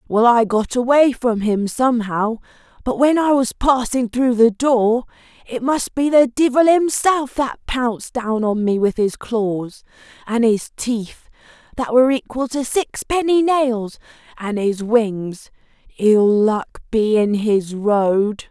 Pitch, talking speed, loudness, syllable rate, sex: 235 Hz, 150 wpm, -18 LUFS, 3.8 syllables/s, female